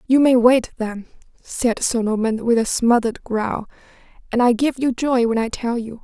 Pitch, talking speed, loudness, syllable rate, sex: 235 Hz, 200 wpm, -19 LUFS, 4.8 syllables/s, female